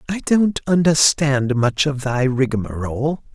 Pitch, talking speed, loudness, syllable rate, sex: 140 Hz, 125 wpm, -18 LUFS, 4.0 syllables/s, male